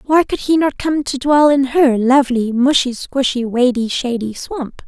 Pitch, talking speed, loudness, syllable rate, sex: 265 Hz, 185 wpm, -15 LUFS, 4.4 syllables/s, female